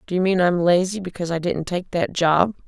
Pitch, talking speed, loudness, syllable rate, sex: 180 Hz, 245 wpm, -21 LUFS, 5.6 syllables/s, female